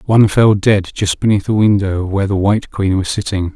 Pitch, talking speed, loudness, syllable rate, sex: 100 Hz, 220 wpm, -14 LUFS, 5.6 syllables/s, male